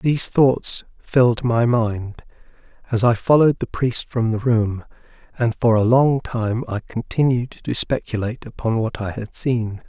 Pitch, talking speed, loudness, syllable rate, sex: 120 Hz, 165 wpm, -20 LUFS, 4.4 syllables/s, male